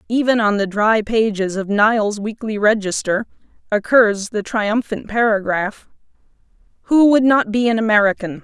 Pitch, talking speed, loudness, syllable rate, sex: 215 Hz, 135 wpm, -17 LUFS, 4.7 syllables/s, female